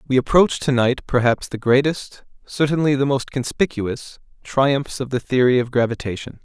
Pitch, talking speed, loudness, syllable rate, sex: 130 Hz, 160 wpm, -19 LUFS, 4.8 syllables/s, male